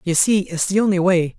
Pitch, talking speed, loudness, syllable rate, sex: 185 Hz, 260 wpm, -18 LUFS, 5.4 syllables/s, male